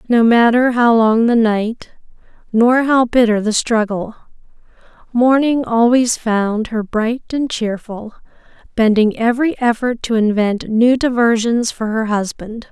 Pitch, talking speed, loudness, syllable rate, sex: 230 Hz, 130 wpm, -15 LUFS, 4.0 syllables/s, female